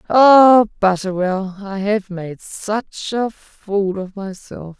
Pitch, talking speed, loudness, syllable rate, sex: 200 Hz, 125 wpm, -16 LUFS, 2.9 syllables/s, female